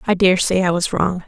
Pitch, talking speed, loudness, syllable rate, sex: 180 Hz, 280 wpm, -17 LUFS, 5.3 syllables/s, female